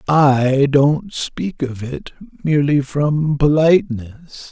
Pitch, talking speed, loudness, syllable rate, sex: 145 Hz, 105 wpm, -17 LUFS, 3.2 syllables/s, male